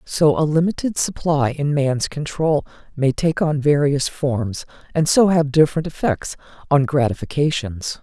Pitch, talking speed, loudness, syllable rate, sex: 150 Hz, 140 wpm, -19 LUFS, 4.4 syllables/s, female